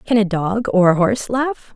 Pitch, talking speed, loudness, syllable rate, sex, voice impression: 215 Hz, 240 wpm, -17 LUFS, 5.0 syllables/s, female, feminine, adult-like, tensed, powerful, soft, clear, fluent, intellectual, calm, friendly, reassuring, elegant, kind, slightly modest